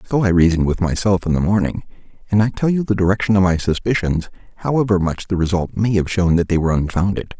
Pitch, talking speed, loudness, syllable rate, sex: 95 Hz, 225 wpm, -18 LUFS, 6.5 syllables/s, male